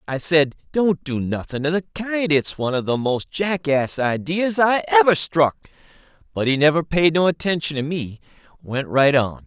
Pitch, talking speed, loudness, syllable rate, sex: 150 Hz, 185 wpm, -20 LUFS, 4.7 syllables/s, male